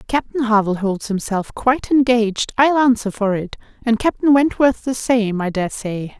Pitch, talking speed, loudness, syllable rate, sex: 230 Hz, 175 wpm, -18 LUFS, 4.9 syllables/s, female